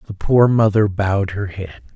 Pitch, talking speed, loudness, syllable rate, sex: 100 Hz, 185 wpm, -17 LUFS, 4.7 syllables/s, male